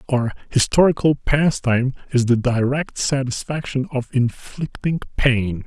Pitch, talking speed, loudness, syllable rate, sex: 130 Hz, 105 wpm, -20 LUFS, 4.4 syllables/s, male